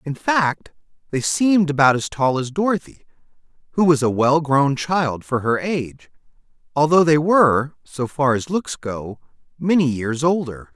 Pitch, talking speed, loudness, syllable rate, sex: 145 Hz, 160 wpm, -19 LUFS, 4.5 syllables/s, male